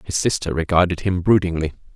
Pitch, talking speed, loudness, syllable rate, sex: 85 Hz, 155 wpm, -20 LUFS, 6.0 syllables/s, male